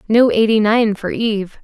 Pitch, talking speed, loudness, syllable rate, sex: 215 Hz, 185 wpm, -15 LUFS, 4.8 syllables/s, female